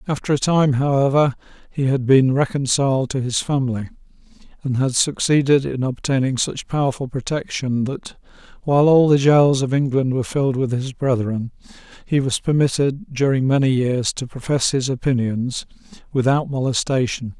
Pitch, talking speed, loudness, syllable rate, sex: 135 Hz, 150 wpm, -19 LUFS, 5.1 syllables/s, male